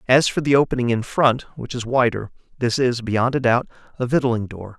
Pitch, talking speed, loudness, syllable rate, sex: 125 Hz, 215 wpm, -20 LUFS, 5.5 syllables/s, male